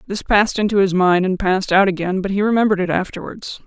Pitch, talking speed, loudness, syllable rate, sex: 190 Hz, 230 wpm, -17 LUFS, 6.6 syllables/s, female